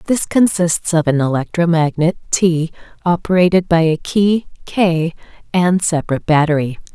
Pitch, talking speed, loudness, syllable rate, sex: 170 Hz, 120 wpm, -16 LUFS, 4.7 syllables/s, female